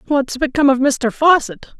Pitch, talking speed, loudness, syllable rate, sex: 275 Hz, 165 wpm, -15 LUFS, 5.3 syllables/s, female